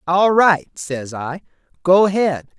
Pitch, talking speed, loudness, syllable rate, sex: 165 Hz, 140 wpm, -17 LUFS, 3.6 syllables/s, male